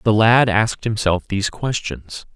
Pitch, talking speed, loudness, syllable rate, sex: 105 Hz, 155 wpm, -18 LUFS, 4.7 syllables/s, male